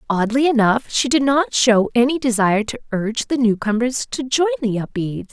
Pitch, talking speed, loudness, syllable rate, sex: 240 Hz, 180 wpm, -18 LUFS, 5.4 syllables/s, female